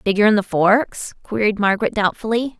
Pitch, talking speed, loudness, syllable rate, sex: 210 Hz, 140 wpm, -18 LUFS, 4.8 syllables/s, female